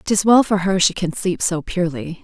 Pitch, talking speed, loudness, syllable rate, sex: 180 Hz, 240 wpm, -18 LUFS, 5.2 syllables/s, female